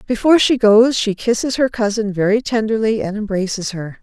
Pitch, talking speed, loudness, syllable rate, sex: 220 Hz, 180 wpm, -16 LUFS, 5.4 syllables/s, female